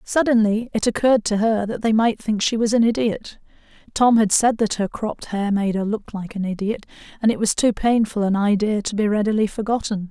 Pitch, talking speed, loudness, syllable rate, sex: 215 Hz, 220 wpm, -20 LUFS, 5.5 syllables/s, female